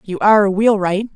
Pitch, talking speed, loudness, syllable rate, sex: 205 Hz, 205 wpm, -14 LUFS, 5.9 syllables/s, female